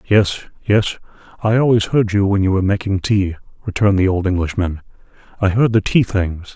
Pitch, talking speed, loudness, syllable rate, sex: 100 Hz, 185 wpm, -17 LUFS, 5.4 syllables/s, male